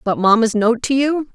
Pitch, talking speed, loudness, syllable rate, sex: 240 Hz, 225 wpm, -16 LUFS, 4.8 syllables/s, female